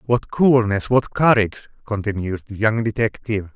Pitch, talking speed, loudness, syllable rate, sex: 110 Hz, 135 wpm, -19 LUFS, 5.0 syllables/s, male